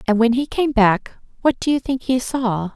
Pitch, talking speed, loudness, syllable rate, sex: 245 Hz, 240 wpm, -19 LUFS, 4.7 syllables/s, female